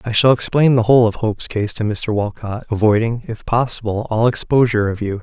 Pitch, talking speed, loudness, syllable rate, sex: 110 Hz, 205 wpm, -17 LUFS, 5.8 syllables/s, male